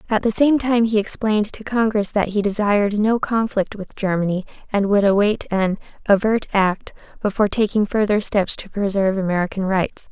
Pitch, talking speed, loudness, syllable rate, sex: 205 Hz, 170 wpm, -19 LUFS, 5.3 syllables/s, female